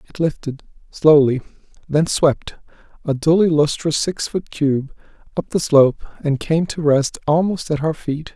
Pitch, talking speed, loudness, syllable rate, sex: 150 Hz, 160 wpm, -18 LUFS, 4.3 syllables/s, male